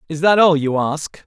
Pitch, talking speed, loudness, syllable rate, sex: 160 Hz, 240 wpm, -16 LUFS, 4.6 syllables/s, male